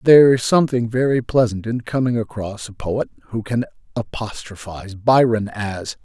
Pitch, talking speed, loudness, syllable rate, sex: 115 Hz, 150 wpm, -19 LUFS, 5.1 syllables/s, male